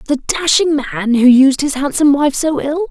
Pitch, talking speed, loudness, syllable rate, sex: 285 Hz, 205 wpm, -13 LUFS, 4.9 syllables/s, female